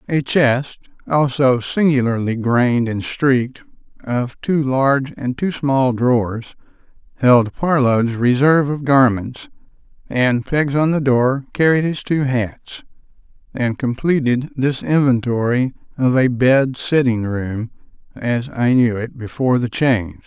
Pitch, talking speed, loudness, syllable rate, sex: 130 Hz, 130 wpm, -17 LUFS, 4.0 syllables/s, male